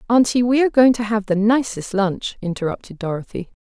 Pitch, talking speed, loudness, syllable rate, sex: 215 Hz, 180 wpm, -19 LUFS, 5.8 syllables/s, female